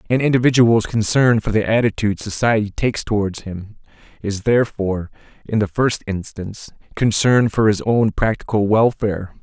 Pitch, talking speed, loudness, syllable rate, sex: 110 Hz, 140 wpm, -18 LUFS, 5.3 syllables/s, male